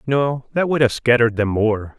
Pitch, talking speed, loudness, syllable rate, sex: 125 Hz, 210 wpm, -18 LUFS, 5.1 syllables/s, male